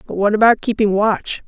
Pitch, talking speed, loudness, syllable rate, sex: 210 Hz, 205 wpm, -16 LUFS, 5.3 syllables/s, female